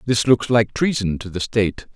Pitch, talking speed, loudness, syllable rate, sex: 110 Hz, 215 wpm, -19 LUFS, 5.1 syllables/s, male